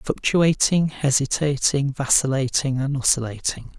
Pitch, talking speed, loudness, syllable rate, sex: 140 Hz, 80 wpm, -21 LUFS, 4.4 syllables/s, male